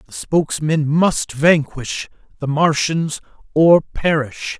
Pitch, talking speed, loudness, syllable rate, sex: 155 Hz, 105 wpm, -17 LUFS, 3.5 syllables/s, male